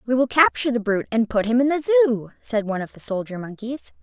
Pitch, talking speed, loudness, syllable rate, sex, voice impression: 235 Hz, 255 wpm, -21 LUFS, 6.6 syllables/s, female, very feminine, young, slightly adult-like, very thin, very tensed, powerful, very bright, hard, very clear, fluent, very cute, slightly intellectual, very refreshing, slightly sincere, very friendly, very reassuring, very unique, wild, sweet, very lively, slightly strict, slightly intense, slightly sharp